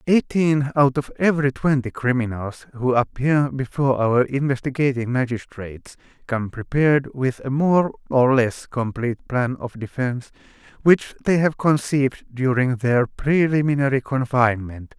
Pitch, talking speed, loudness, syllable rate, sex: 130 Hz, 125 wpm, -21 LUFS, 4.7 syllables/s, male